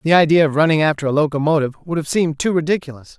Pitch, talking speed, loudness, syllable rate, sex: 155 Hz, 225 wpm, -17 LUFS, 7.6 syllables/s, male